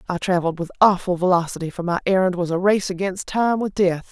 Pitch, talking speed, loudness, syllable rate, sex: 185 Hz, 220 wpm, -20 LUFS, 6.1 syllables/s, female